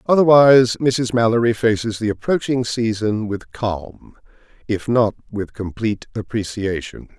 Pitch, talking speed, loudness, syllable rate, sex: 115 Hz, 115 wpm, -18 LUFS, 4.4 syllables/s, male